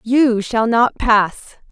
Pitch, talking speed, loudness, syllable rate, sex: 230 Hz, 140 wpm, -16 LUFS, 2.9 syllables/s, female